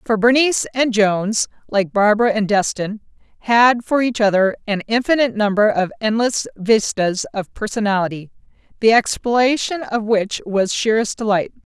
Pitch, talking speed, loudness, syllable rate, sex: 215 Hz, 140 wpm, -17 LUFS, 5.0 syllables/s, female